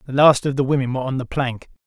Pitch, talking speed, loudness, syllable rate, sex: 135 Hz, 290 wpm, -19 LUFS, 7.1 syllables/s, male